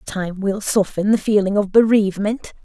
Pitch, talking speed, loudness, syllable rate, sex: 200 Hz, 160 wpm, -18 LUFS, 4.9 syllables/s, female